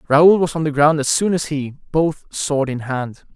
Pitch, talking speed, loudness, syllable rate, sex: 150 Hz, 230 wpm, -18 LUFS, 4.5 syllables/s, male